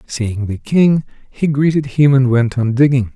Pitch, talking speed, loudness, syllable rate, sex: 130 Hz, 190 wpm, -15 LUFS, 4.4 syllables/s, male